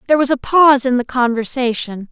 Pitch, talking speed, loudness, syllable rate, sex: 255 Hz, 200 wpm, -15 LUFS, 6.2 syllables/s, female